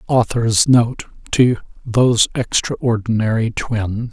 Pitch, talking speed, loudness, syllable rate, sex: 115 Hz, 85 wpm, -17 LUFS, 3.6 syllables/s, male